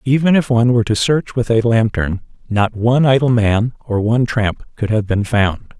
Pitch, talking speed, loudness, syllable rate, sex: 115 Hz, 205 wpm, -16 LUFS, 5.3 syllables/s, male